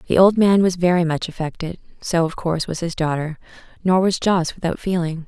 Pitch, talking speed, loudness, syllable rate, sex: 175 Hz, 205 wpm, -20 LUFS, 5.6 syllables/s, female